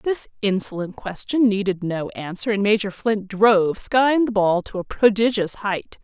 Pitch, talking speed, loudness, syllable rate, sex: 205 Hz, 170 wpm, -21 LUFS, 4.5 syllables/s, female